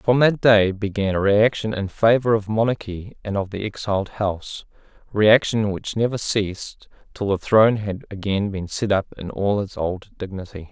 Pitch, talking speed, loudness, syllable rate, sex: 105 Hz, 180 wpm, -21 LUFS, 4.8 syllables/s, male